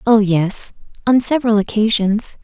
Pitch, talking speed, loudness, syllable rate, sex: 215 Hz, 125 wpm, -16 LUFS, 4.6 syllables/s, female